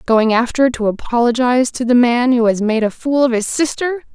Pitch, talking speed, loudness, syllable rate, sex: 245 Hz, 215 wpm, -15 LUFS, 5.4 syllables/s, female